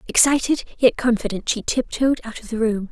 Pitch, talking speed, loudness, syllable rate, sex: 235 Hz, 205 wpm, -20 LUFS, 5.4 syllables/s, female